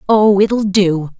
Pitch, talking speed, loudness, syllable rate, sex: 195 Hz, 150 wpm, -13 LUFS, 3.2 syllables/s, female